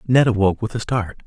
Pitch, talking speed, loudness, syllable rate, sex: 110 Hz, 235 wpm, -19 LUFS, 6.6 syllables/s, male